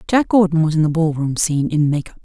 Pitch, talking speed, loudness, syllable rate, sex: 160 Hz, 240 wpm, -17 LUFS, 6.3 syllables/s, female